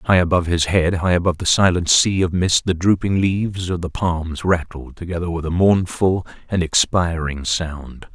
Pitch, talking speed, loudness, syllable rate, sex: 90 Hz, 185 wpm, -19 LUFS, 4.9 syllables/s, male